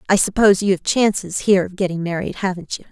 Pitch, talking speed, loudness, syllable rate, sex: 190 Hz, 225 wpm, -18 LUFS, 6.7 syllables/s, female